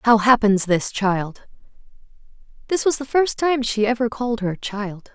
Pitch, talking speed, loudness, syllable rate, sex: 225 Hz, 165 wpm, -20 LUFS, 2.2 syllables/s, female